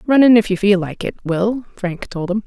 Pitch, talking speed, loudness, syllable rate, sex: 205 Hz, 270 wpm, -17 LUFS, 5.1 syllables/s, female